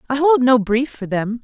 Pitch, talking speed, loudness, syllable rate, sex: 250 Hz, 250 wpm, -17 LUFS, 4.8 syllables/s, female